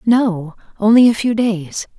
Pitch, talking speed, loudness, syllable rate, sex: 210 Hz, 150 wpm, -15 LUFS, 3.8 syllables/s, female